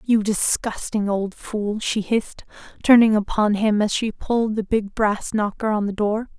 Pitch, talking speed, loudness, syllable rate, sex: 215 Hz, 180 wpm, -21 LUFS, 4.4 syllables/s, female